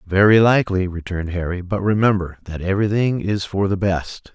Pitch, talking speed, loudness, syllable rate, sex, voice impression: 95 Hz, 165 wpm, -19 LUFS, 5.5 syllables/s, male, very masculine, middle-aged, very thick, very tensed, very powerful, slightly dark, slightly hard, slightly muffled, fluent, slightly raspy, cool, very intellectual, slightly refreshing, sincere, very calm, very mature, very friendly, very reassuring, very unique, slightly elegant, wild, sweet, lively, kind, slightly modest